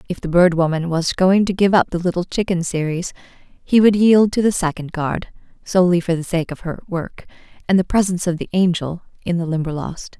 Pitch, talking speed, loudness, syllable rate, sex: 175 Hz, 210 wpm, -18 LUFS, 5.5 syllables/s, female